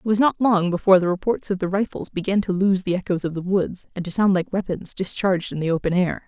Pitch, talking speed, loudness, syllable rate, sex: 185 Hz, 270 wpm, -22 LUFS, 6.2 syllables/s, female